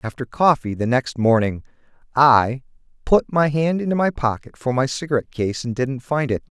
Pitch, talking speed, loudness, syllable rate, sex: 135 Hz, 185 wpm, -20 LUFS, 5.1 syllables/s, male